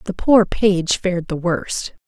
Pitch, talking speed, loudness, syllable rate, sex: 185 Hz, 175 wpm, -18 LUFS, 3.9 syllables/s, female